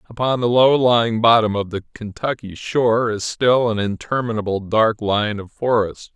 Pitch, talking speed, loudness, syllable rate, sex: 110 Hz, 165 wpm, -18 LUFS, 4.8 syllables/s, male